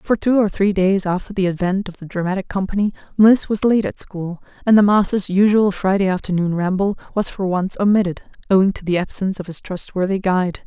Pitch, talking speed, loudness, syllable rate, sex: 190 Hz, 205 wpm, -18 LUFS, 5.7 syllables/s, female